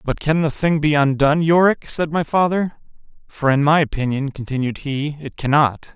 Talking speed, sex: 170 wpm, male